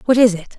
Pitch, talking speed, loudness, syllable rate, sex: 220 Hz, 305 wpm, -15 LUFS, 6.7 syllables/s, female